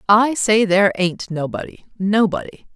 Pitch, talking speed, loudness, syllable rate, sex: 195 Hz, 110 wpm, -18 LUFS, 4.7 syllables/s, female